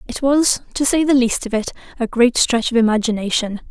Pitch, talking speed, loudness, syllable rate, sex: 245 Hz, 210 wpm, -17 LUFS, 5.6 syllables/s, female